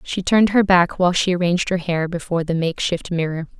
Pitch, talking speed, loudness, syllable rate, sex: 175 Hz, 215 wpm, -19 LUFS, 6.4 syllables/s, female